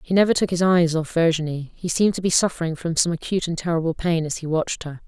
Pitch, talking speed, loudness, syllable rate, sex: 165 Hz, 260 wpm, -21 LUFS, 6.7 syllables/s, female